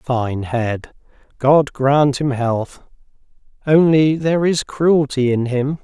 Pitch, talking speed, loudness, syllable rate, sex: 140 Hz, 125 wpm, -17 LUFS, 3.6 syllables/s, male